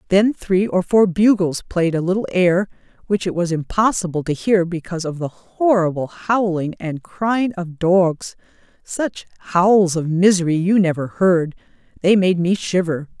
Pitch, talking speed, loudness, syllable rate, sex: 180 Hz, 150 wpm, -18 LUFS, 4.4 syllables/s, female